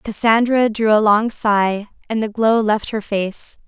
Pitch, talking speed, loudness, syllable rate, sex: 215 Hz, 180 wpm, -17 LUFS, 4.0 syllables/s, female